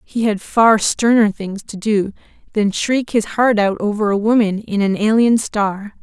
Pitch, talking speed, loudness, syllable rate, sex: 210 Hz, 190 wpm, -16 LUFS, 4.4 syllables/s, female